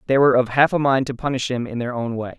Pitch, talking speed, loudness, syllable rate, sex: 130 Hz, 325 wpm, -20 LUFS, 6.8 syllables/s, male